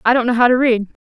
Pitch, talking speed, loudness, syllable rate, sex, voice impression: 240 Hz, 350 wpm, -15 LUFS, 7.3 syllables/s, female, feminine, slightly young, relaxed, powerful, bright, soft, slightly raspy, cute, intellectual, elegant, lively, intense